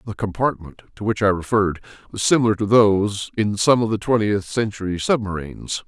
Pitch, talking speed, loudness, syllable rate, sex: 105 Hz, 175 wpm, -20 LUFS, 5.7 syllables/s, male